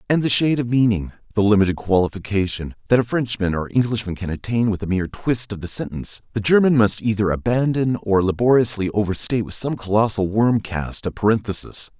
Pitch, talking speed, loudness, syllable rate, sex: 105 Hz, 180 wpm, -20 LUFS, 5.9 syllables/s, male